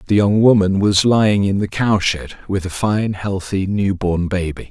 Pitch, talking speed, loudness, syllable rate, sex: 100 Hz, 190 wpm, -17 LUFS, 4.8 syllables/s, male